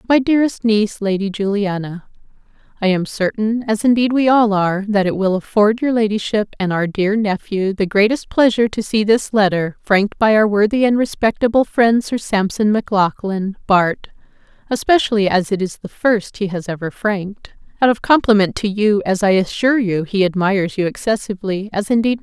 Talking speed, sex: 185 wpm, female